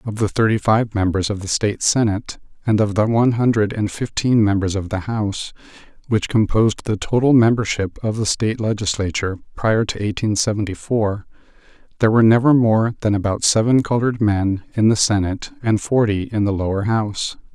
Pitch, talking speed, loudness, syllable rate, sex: 110 Hz, 170 wpm, -18 LUFS, 5.7 syllables/s, male